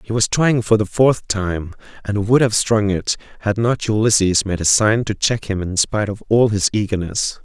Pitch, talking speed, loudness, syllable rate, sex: 105 Hz, 220 wpm, -17 LUFS, 4.8 syllables/s, male